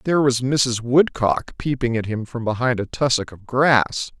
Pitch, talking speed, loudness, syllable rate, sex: 125 Hz, 185 wpm, -20 LUFS, 4.6 syllables/s, male